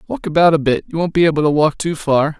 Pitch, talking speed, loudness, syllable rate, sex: 160 Hz, 300 wpm, -16 LUFS, 6.5 syllables/s, male